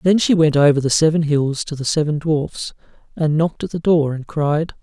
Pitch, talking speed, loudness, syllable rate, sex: 155 Hz, 225 wpm, -18 LUFS, 5.2 syllables/s, male